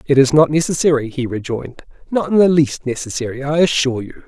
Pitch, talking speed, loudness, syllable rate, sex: 140 Hz, 195 wpm, -17 LUFS, 6.2 syllables/s, male